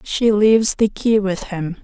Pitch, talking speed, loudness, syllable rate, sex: 205 Hz, 195 wpm, -17 LUFS, 4.1 syllables/s, female